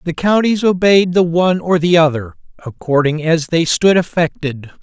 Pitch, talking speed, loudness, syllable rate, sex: 170 Hz, 160 wpm, -14 LUFS, 4.8 syllables/s, male